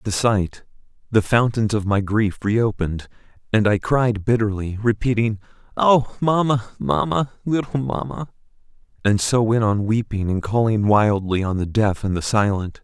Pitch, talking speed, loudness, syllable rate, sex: 110 Hz, 155 wpm, -20 LUFS, 4.6 syllables/s, male